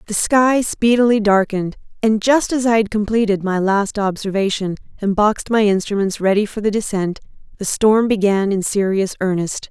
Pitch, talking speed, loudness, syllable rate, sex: 205 Hz, 165 wpm, -17 LUFS, 5.1 syllables/s, female